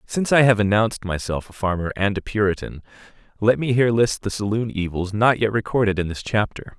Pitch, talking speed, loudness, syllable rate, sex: 105 Hz, 205 wpm, -21 LUFS, 5.9 syllables/s, male